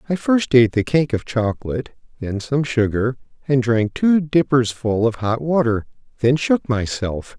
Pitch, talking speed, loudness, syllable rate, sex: 125 Hz, 155 wpm, -19 LUFS, 4.6 syllables/s, male